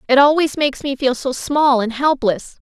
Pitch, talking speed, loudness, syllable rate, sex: 270 Hz, 205 wpm, -17 LUFS, 4.9 syllables/s, female